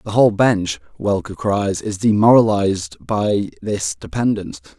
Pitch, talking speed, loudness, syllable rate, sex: 100 Hz, 125 wpm, -18 LUFS, 4.8 syllables/s, male